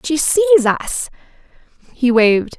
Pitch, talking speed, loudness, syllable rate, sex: 285 Hz, 115 wpm, -15 LUFS, 4.0 syllables/s, female